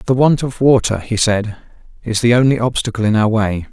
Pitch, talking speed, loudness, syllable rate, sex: 115 Hz, 210 wpm, -15 LUFS, 5.4 syllables/s, male